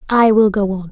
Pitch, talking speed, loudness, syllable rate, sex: 205 Hz, 265 wpm, -14 LUFS, 5.5 syllables/s, female